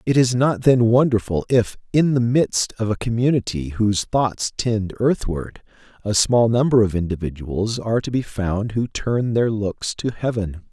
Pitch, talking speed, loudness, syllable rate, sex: 110 Hz, 175 wpm, -20 LUFS, 4.4 syllables/s, male